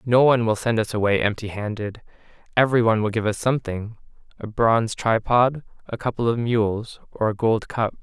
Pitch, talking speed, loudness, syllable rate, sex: 115 Hz, 180 wpm, -22 LUFS, 5.6 syllables/s, male